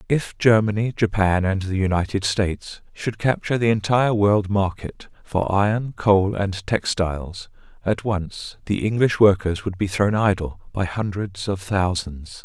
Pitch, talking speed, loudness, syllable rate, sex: 100 Hz, 150 wpm, -21 LUFS, 4.4 syllables/s, male